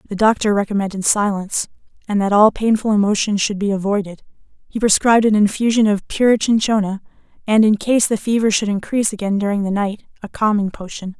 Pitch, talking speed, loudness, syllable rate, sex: 210 Hz, 175 wpm, -17 LUFS, 6.0 syllables/s, female